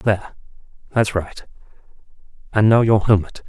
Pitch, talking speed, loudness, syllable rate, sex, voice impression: 105 Hz, 120 wpm, -18 LUFS, 5.0 syllables/s, male, masculine, adult-like, fluent, intellectual, kind